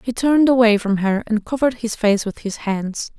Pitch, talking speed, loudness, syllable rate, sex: 225 Hz, 225 wpm, -18 LUFS, 5.3 syllables/s, female